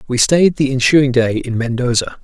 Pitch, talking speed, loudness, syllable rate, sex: 130 Hz, 190 wpm, -14 LUFS, 4.8 syllables/s, male